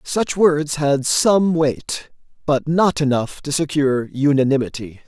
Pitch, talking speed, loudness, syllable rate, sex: 145 Hz, 130 wpm, -18 LUFS, 4.0 syllables/s, male